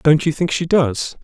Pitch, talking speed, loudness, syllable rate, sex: 155 Hz, 240 wpm, -17 LUFS, 4.4 syllables/s, male